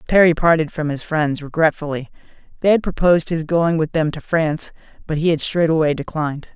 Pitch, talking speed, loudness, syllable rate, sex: 160 Hz, 185 wpm, -19 LUFS, 5.7 syllables/s, male